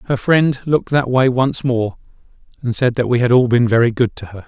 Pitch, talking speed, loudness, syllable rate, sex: 125 Hz, 240 wpm, -16 LUFS, 5.5 syllables/s, male